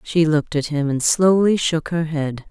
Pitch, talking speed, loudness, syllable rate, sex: 160 Hz, 215 wpm, -19 LUFS, 4.6 syllables/s, female